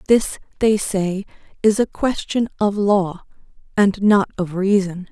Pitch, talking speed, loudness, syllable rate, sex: 200 Hz, 140 wpm, -19 LUFS, 3.8 syllables/s, female